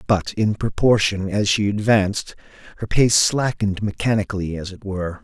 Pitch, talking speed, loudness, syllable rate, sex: 100 Hz, 150 wpm, -20 LUFS, 5.2 syllables/s, male